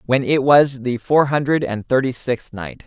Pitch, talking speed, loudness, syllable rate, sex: 130 Hz, 210 wpm, -18 LUFS, 4.4 syllables/s, male